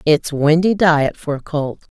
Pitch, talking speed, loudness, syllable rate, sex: 155 Hz, 180 wpm, -17 LUFS, 3.9 syllables/s, female